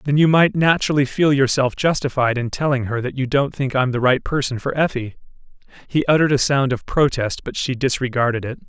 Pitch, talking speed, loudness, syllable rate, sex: 135 Hz, 205 wpm, -19 LUFS, 5.8 syllables/s, male